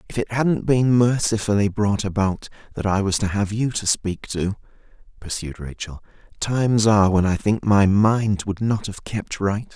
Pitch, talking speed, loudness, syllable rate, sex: 105 Hz, 185 wpm, -21 LUFS, 4.6 syllables/s, male